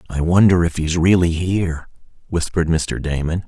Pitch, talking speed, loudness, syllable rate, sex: 85 Hz, 155 wpm, -18 LUFS, 5.2 syllables/s, male